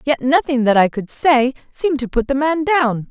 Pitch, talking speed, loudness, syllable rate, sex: 270 Hz, 230 wpm, -17 LUFS, 4.9 syllables/s, female